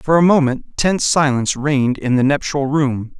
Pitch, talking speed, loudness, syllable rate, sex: 140 Hz, 190 wpm, -16 LUFS, 5.1 syllables/s, male